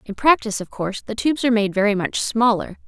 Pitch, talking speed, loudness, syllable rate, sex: 220 Hz, 230 wpm, -20 LUFS, 6.7 syllables/s, female